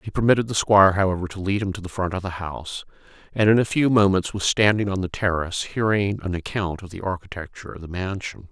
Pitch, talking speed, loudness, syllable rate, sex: 95 Hz, 230 wpm, -22 LUFS, 6.4 syllables/s, male